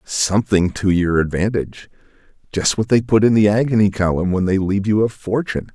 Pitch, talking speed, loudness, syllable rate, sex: 100 Hz, 190 wpm, -17 LUFS, 5.8 syllables/s, male